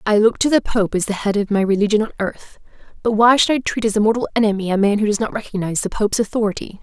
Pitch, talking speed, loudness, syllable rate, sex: 210 Hz, 275 wpm, -18 LUFS, 7.0 syllables/s, female